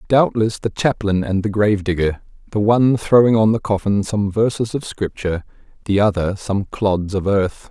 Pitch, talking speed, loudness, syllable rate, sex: 105 Hz, 165 wpm, -18 LUFS, 5.0 syllables/s, male